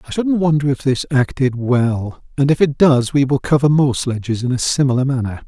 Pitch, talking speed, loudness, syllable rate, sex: 135 Hz, 220 wpm, -16 LUFS, 5.2 syllables/s, male